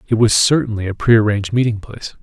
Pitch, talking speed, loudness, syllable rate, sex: 110 Hz, 190 wpm, -16 LUFS, 6.4 syllables/s, male